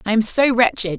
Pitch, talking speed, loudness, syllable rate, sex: 225 Hz, 245 wpm, -17 LUFS, 5.4 syllables/s, female